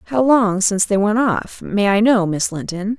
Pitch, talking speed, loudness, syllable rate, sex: 210 Hz, 200 wpm, -17 LUFS, 4.7 syllables/s, female